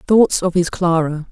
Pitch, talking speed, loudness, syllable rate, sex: 175 Hz, 180 wpm, -16 LUFS, 4.4 syllables/s, female